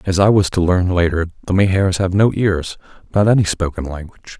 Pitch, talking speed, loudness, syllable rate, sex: 90 Hz, 205 wpm, -16 LUFS, 5.7 syllables/s, male